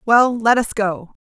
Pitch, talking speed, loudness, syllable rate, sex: 220 Hz, 190 wpm, -17 LUFS, 3.8 syllables/s, female